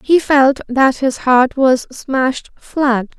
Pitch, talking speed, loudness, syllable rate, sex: 265 Hz, 150 wpm, -14 LUFS, 3.2 syllables/s, female